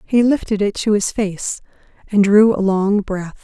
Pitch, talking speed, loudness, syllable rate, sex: 205 Hz, 190 wpm, -17 LUFS, 4.3 syllables/s, female